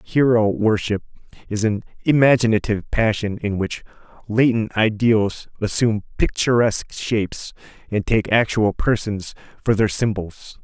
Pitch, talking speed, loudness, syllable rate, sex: 110 Hz, 115 wpm, -20 LUFS, 4.6 syllables/s, male